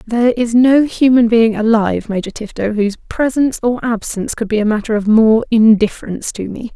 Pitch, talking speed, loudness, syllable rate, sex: 225 Hz, 185 wpm, -14 LUFS, 5.8 syllables/s, female